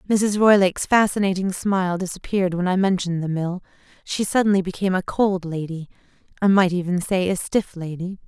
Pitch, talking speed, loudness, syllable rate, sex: 185 Hz, 160 wpm, -21 LUFS, 5.8 syllables/s, female